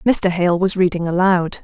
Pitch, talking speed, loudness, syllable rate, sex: 180 Hz, 185 wpm, -17 LUFS, 4.4 syllables/s, female